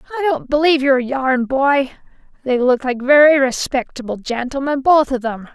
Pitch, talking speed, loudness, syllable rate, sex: 265 Hz, 150 wpm, -16 LUFS, 5.1 syllables/s, female